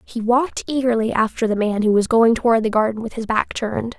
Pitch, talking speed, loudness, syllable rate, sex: 225 Hz, 240 wpm, -19 LUFS, 6.0 syllables/s, female